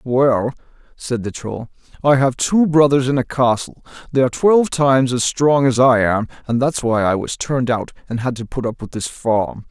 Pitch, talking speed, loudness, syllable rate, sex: 130 Hz, 215 wpm, -17 LUFS, 5.0 syllables/s, male